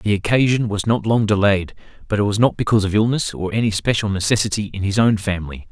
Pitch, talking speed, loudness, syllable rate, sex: 105 Hz, 210 wpm, -19 LUFS, 6.4 syllables/s, male